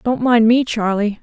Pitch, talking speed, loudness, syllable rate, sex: 230 Hz, 195 wpm, -15 LUFS, 4.4 syllables/s, female